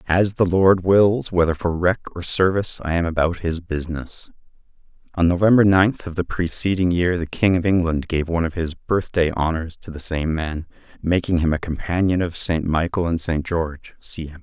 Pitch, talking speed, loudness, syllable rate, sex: 85 Hz, 200 wpm, -20 LUFS, 5.2 syllables/s, male